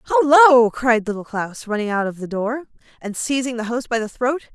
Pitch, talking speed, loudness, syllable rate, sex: 240 Hz, 210 wpm, -19 LUFS, 5.1 syllables/s, female